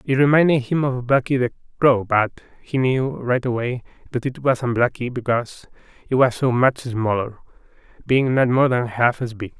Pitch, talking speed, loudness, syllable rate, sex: 125 Hz, 180 wpm, -20 LUFS, 4.9 syllables/s, male